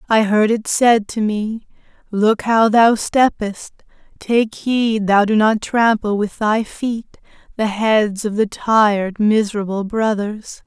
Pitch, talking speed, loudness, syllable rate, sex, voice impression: 215 Hz, 145 wpm, -17 LUFS, 3.6 syllables/s, female, feminine, adult-like, slightly dark, friendly, slightly reassuring